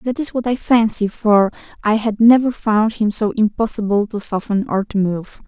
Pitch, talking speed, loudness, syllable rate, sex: 215 Hz, 195 wpm, -17 LUFS, 4.8 syllables/s, female